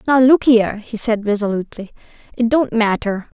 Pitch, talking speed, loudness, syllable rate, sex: 225 Hz, 160 wpm, -16 LUFS, 5.5 syllables/s, female